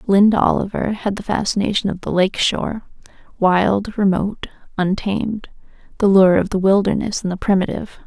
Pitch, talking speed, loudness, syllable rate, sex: 195 Hz, 135 wpm, -18 LUFS, 5.5 syllables/s, female